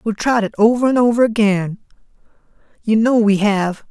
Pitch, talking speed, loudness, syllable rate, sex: 215 Hz, 170 wpm, -15 LUFS, 5.4 syllables/s, male